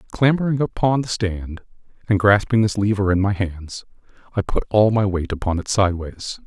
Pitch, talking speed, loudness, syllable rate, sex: 100 Hz, 175 wpm, -20 LUFS, 5.2 syllables/s, male